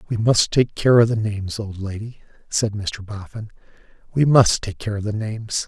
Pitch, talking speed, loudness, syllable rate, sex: 105 Hz, 200 wpm, -20 LUFS, 5.0 syllables/s, male